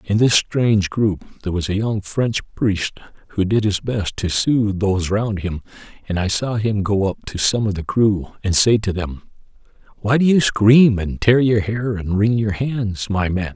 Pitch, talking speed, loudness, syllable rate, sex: 105 Hz, 215 wpm, -19 LUFS, 4.5 syllables/s, male